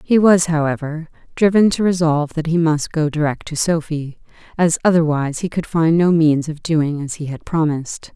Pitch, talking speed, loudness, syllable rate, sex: 160 Hz, 190 wpm, -17 LUFS, 5.2 syllables/s, female